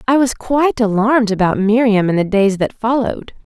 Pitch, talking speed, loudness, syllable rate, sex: 225 Hz, 185 wpm, -15 LUFS, 5.6 syllables/s, female